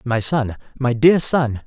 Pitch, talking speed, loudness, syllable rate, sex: 130 Hz, 180 wpm, -18 LUFS, 3.7 syllables/s, male